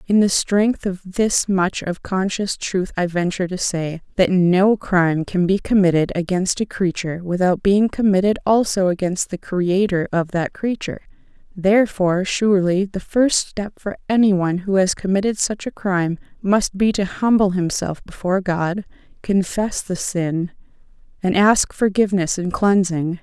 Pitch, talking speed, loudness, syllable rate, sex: 190 Hz, 150 wpm, -19 LUFS, 4.6 syllables/s, female